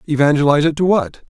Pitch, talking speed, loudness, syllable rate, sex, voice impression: 150 Hz, 175 wpm, -15 LUFS, 7.0 syllables/s, male, very masculine, slightly old, thick, relaxed, slightly powerful, slightly dark, soft, slightly muffled, fluent, slightly raspy, cool, very intellectual, refreshing, very sincere, very calm, slightly mature, friendly, very reassuring, very unique, elegant, very wild, sweet, lively, kind, slightly modest